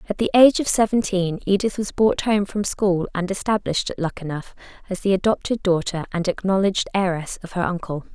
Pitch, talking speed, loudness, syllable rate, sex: 190 Hz, 185 wpm, -21 LUFS, 5.7 syllables/s, female